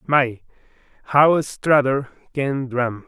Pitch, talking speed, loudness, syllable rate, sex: 135 Hz, 95 wpm, -19 LUFS, 3.0 syllables/s, male